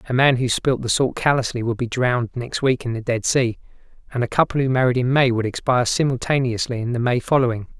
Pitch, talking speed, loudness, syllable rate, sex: 125 Hz, 230 wpm, -20 LUFS, 6.2 syllables/s, male